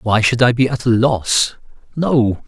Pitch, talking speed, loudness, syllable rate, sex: 120 Hz, 195 wpm, -15 LUFS, 3.9 syllables/s, male